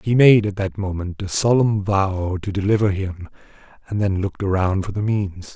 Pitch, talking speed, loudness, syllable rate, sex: 100 Hz, 195 wpm, -20 LUFS, 5.0 syllables/s, male